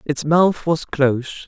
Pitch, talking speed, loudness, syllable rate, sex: 150 Hz, 165 wpm, -18 LUFS, 4.0 syllables/s, male